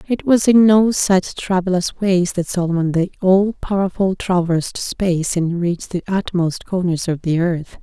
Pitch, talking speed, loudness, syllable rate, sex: 185 Hz, 170 wpm, -17 LUFS, 4.5 syllables/s, female